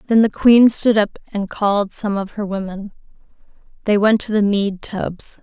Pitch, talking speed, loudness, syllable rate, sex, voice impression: 205 Hz, 190 wpm, -17 LUFS, 4.5 syllables/s, female, very feminine, young, thin, very tensed, powerful, very bright, hard, very clear, fluent, slightly raspy, very cute, intellectual, very refreshing, sincere, very calm, very friendly, very reassuring, elegant, sweet, lively, kind, slightly modest, light